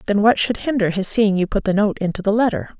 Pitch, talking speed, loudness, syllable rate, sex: 205 Hz, 280 wpm, -18 LUFS, 6.2 syllables/s, female